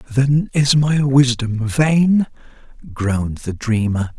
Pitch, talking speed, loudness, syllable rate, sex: 130 Hz, 115 wpm, -17 LUFS, 3.4 syllables/s, male